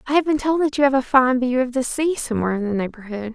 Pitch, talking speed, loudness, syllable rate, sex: 260 Hz, 305 wpm, -20 LUFS, 6.9 syllables/s, female